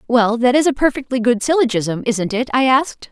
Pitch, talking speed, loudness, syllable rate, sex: 245 Hz, 210 wpm, -16 LUFS, 5.6 syllables/s, female